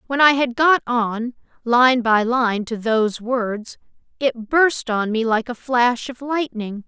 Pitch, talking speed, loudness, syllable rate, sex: 240 Hz, 175 wpm, -19 LUFS, 3.7 syllables/s, female